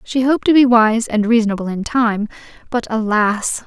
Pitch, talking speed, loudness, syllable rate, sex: 230 Hz, 180 wpm, -16 LUFS, 5.1 syllables/s, female